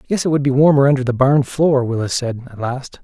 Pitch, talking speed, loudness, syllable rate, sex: 135 Hz, 275 wpm, -16 LUFS, 5.9 syllables/s, male